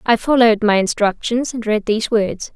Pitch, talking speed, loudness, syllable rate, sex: 220 Hz, 190 wpm, -17 LUFS, 5.4 syllables/s, female